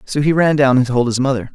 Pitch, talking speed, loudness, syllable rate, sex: 135 Hz, 310 wpm, -15 LUFS, 6.3 syllables/s, male